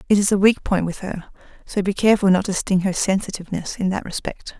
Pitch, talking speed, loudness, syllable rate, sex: 190 Hz, 235 wpm, -20 LUFS, 6.2 syllables/s, female